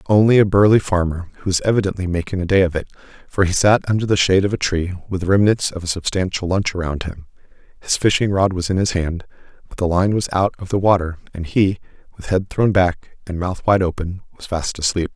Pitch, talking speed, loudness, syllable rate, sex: 95 Hz, 240 wpm, -18 LUFS, 6.1 syllables/s, male